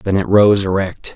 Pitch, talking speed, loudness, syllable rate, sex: 95 Hz, 205 wpm, -14 LUFS, 4.5 syllables/s, male